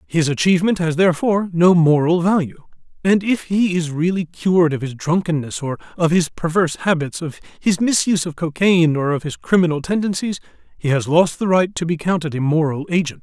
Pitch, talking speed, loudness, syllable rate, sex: 170 Hz, 190 wpm, -18 LUFS, 5.7 syllables/s, male